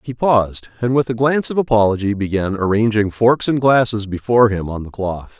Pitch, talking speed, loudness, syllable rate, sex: 110 Hz, 200 wpm, -17 LUFS, 5.6 syllables/s, male